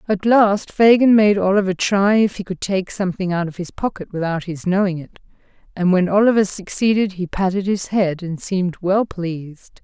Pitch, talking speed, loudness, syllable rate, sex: 190 Hz, 190 wpm, -18 LUFS, 5.1 syllables/s, female